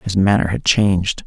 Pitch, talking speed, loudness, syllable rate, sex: 95 Hz, 190 wpm, -16 LUFS, 4.9 syllables/s, male